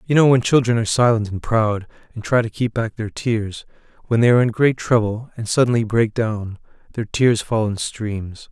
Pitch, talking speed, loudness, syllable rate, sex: 110 Hz, 210 wpm, -19 LUFS, 5.1 syllables/s, male